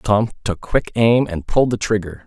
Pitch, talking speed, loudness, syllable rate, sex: 105 Hz, 210 wpm, -19 LUFS, 4.9 syllables/s, male